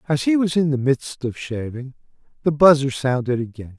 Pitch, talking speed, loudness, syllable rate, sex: 135 Hz, 190 wpm, -20 LUFS, 5.1 syllables/s, male